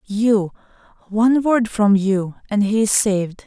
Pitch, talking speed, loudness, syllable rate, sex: 210 Hz, 155 wpm, -18 LUFS, 4.2 syllables/s, female